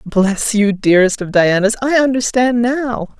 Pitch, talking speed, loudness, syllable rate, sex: 220 Hz, 150 wpm, -14 LUFS, 4.3 syllables/s, female